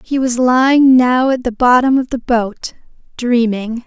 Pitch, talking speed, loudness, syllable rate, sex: 245 Hz, 170 wpm, -13 LUFS, 4.2 syllables/s, female